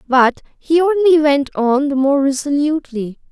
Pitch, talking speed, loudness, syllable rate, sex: 285 Hz, 145 wpm, -15 LUFS, 4.6 syllables/s, female